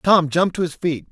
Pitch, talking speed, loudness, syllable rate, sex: 165 Hz, 270 wpm, -19 LUFS, 5.7 syllables/s, male